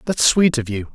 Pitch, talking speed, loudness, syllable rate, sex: 135 Hz, 255 wpm, -17 LUFS, 5.1 syllables/s, male